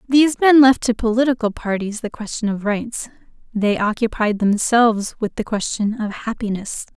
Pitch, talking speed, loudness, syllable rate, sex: 225 Hz, 155 wpm, -18 LUFS, 5.0 syllables/s, female